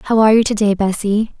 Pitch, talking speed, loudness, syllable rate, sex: 210 Hz, 215 wpm, -15 LUFS, 6.7 syllables/s, female